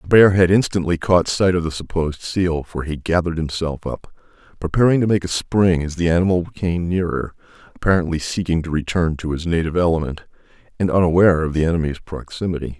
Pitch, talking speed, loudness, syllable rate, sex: 85 Hz, 185 wpm, -19 LUFS, 6.0 syllables/s, male